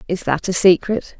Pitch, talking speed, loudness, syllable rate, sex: 180 Hz, 200 wpm, -17 LUFS, 5.0 syllables/s, female